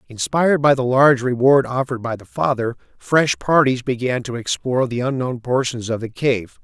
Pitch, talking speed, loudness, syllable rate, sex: 125 Hz, 180 wpm, -19 LUFS, 5.3 syllables/s, male